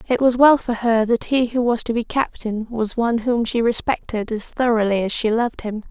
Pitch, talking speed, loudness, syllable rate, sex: 230 Hz, 235 wpm, -20 LUFS, 5.3 syllables/s, female